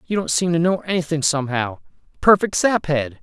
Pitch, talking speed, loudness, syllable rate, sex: 160 Hz, 165 wpm, -19 LUFS, 5.7 syllables/s, male